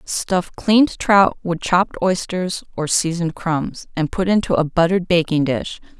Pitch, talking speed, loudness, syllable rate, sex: 175 Hz, 160 wpm, -18 LUFS, 4.6 syllables/s, female